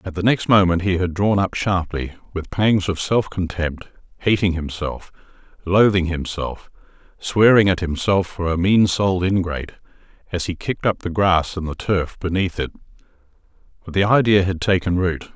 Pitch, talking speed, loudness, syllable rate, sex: 90 Hz, 170 wpm, -20 LUFS, 4.9 syllables/s, male